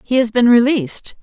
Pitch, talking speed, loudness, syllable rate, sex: 235 Hz, 195 wpm, -14 LUFS, 5.5 syllables/s, female